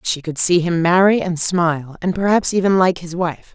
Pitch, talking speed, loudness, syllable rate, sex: 175 Hz, 205 wpm, -17 LUFS, 5.0 syllables/s, female